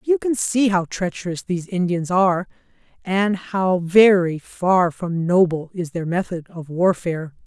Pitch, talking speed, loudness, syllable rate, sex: 180 Hz, 155 wpm, -20 LUFS, 4.4 syllables/s, female